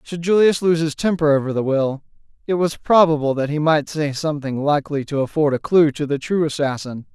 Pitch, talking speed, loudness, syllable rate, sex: 150 Hz, 210 wpm, -19 LUFS, 5.6 syllables/s, male